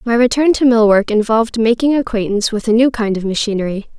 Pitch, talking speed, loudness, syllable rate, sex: 225 Hz, 210 wpm, -14 LUFS, 6.3 syllables/s, female